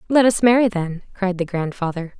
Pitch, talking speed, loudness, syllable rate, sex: 195 Hz, 190 wpm, -19 LUFS, 5.3 syllables/s, female